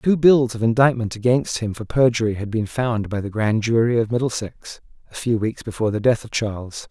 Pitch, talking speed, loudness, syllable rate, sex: 115 Hz, 215 wpm, -20 LUFS, 5.5 syllables/s, male